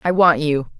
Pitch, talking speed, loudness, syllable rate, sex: 155 Hz, 225 wpm, -17 LUFS, 4.7 syllables/s, female